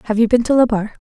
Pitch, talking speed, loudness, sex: 230 Hz, 290 wpm, -15 LUFS, female